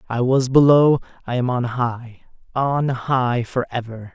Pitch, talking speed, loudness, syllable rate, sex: 125 Hz, 145 wpm, -19 LUFS, 4.0 syllables/s, male